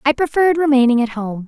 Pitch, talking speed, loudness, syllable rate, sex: 265 Hz, 205 wpm, -16 LUFS, 6.6 syllables/s, female